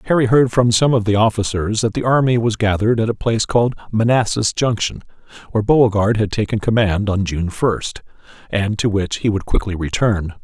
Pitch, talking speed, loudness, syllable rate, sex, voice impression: 110 Hz, 190 wpm, -17 LUFS, 5.6 syllables/s, male, masculine, adult-like, slightly relaxed, powerful, clear, slightly raspy, cool, intellectual, mature, friendly, wild, lively, slightly kind